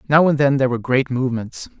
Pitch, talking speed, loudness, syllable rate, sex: 135 Hz, 235 wpm, -18 LUFS, 7.1 syllables/s, male